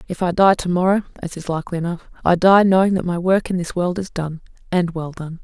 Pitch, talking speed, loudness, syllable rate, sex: 175 Hz, 255 wpm, -19 LUFS, 6.0 syllables/s, female